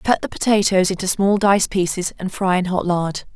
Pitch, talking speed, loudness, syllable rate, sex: 190 Hz, 215 wpm, -19 LUFS, 5.1 syllables/s, female